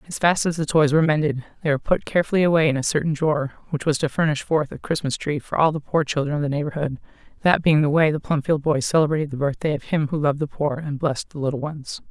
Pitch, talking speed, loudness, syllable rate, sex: 150 Hz, 265 wpm, -22 LUFS, 6.8 syllables/s, female